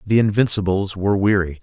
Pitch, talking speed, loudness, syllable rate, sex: 100 Hz, 150 wpm, -19 LUFS, 5.9 syllables/s, male